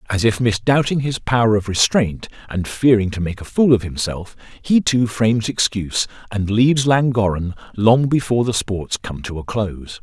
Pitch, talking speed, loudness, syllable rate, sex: 110 Hz, 180 wpm, -18 LUFS, 5.0 syllables/s, male